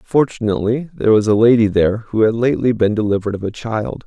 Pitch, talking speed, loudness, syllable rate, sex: 110 Hz, 205 wpm, -16 LUFS, 6.6 syllables/s, male